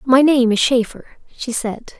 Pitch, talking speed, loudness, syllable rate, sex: 245 Hz, 180 wpm, -16 LUFS, 4.2 syllables/s, female